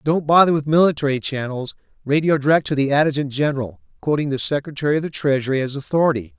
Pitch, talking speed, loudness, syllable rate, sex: 140 Hz, 180 wpm, -19 LUFS, 6.7 syllables/s, male